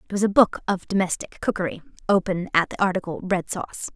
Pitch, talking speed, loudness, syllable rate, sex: 185 Hz, 195 wpm, -23 LUFS, 6.3 syllables/s, female